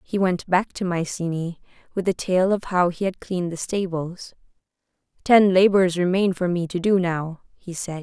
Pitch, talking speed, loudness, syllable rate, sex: 180 Hz, 185 wpm, -22 LUFS, 4.7 syllables/s, female